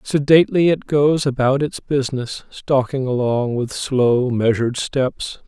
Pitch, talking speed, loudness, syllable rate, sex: 130 Hz, 130 wpm, -18 LUFS, 4.1 syllables/s, male